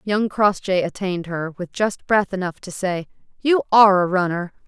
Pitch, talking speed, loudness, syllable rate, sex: 190 Hz, 180 wpm, -20 LUFS, 4.9 syllables/s, female